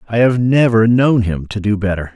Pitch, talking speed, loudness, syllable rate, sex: 110 Hz, 220 wpm, -14 LUFS, 5.1 syllables/s, male